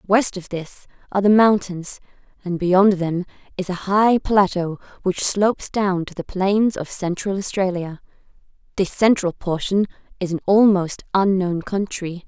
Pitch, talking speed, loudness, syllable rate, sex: 190 Hz, 145 wpm, -20 LUFS, 4.3 syllables/s, female